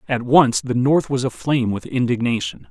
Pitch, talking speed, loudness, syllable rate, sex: 125 Hz, 175 wpm, -19 LUFS, 5.1 syllables/s, male